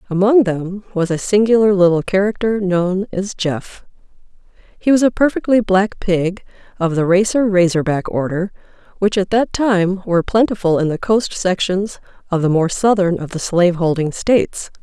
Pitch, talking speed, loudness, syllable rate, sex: 190 Hz, 165 wpm, -16 LUFS, 4.9 syllables/s, female